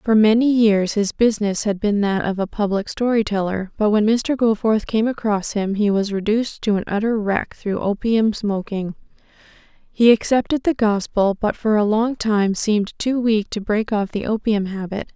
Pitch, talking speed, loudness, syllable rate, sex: 210 Hz, 190 wpm, -19 LUFS, 4.8 syllables/s, female